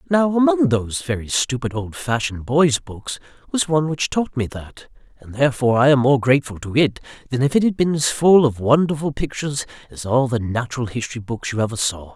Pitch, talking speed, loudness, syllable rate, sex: 135 Hz, 200 wpm, -19 LUFS, 5.8 syllables/s, male